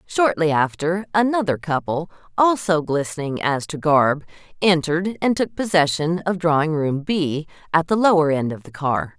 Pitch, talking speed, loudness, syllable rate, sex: 165 Hz, 155 wpm, -20 LUFS, 4.8 syllables/s, female